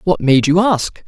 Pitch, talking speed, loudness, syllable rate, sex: 170 Hz, 225 wpm, -14 LUFS, 4.2 syllables/s, male